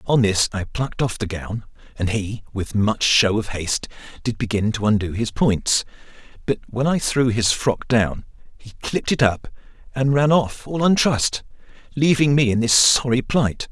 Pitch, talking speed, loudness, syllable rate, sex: 115 Hz, 185 wpm, -20 LUFS, 4.7 syllables/s, male